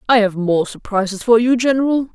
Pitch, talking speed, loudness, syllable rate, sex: 225 Hz, 195 wpm, -16 LUFS, 5.7 syllables/s, female